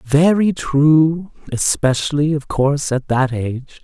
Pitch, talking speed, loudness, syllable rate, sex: 145 Hz, 125 wpm, -16 LUFS, 4.0 syllables/s, male